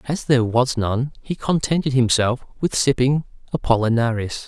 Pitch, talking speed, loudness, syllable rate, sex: 125 Hz, 135 wpm, -20 LUFS, 5.0 syllables/s, male